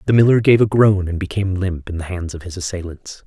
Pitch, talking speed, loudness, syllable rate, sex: 95 Hz, 255 wpm, -18 LUFS, 6.1 syllables/s, male